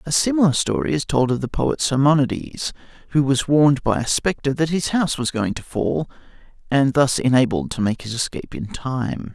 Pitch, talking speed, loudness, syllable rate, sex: 140 Hz, 200 wpm, -20 LUFS, 5.3 syllables/s, male